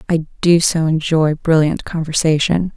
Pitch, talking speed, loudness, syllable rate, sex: 160 Hz, 130 wpm, -16 LUFS, 4.3 syllables/s, female